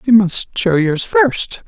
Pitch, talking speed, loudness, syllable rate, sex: 175 Hz, 180 wpm, -15 LUFS, 3.2 syllables/s, male